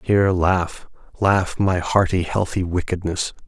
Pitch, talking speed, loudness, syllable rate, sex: 90 Hz, 120 wpm, -20 LUFS, 4.1 syllables/s, male